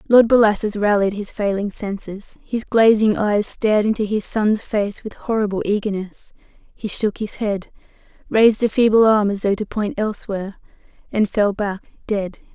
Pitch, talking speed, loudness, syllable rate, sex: 210 Hz, 165 wpm, -19 LUFS, 4.8 syllables/s, female